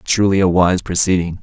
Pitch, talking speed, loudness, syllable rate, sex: 90 Hz, 170 wpm, -15 LUFS, 5.3 syllables/s, male